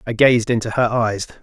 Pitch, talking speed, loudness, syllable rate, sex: 115 Hz, 210 wpm, -17 LUFS, 5.2 syllables/s, male